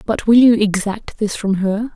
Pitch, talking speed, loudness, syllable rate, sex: 215 Hz, 215 wpm, -16 LUFS, 4.4 syllables/s, female